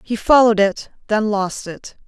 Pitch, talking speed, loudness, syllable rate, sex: 210 Hz, 175 wpm, -16 LUFS, 4.7 syllables/s, female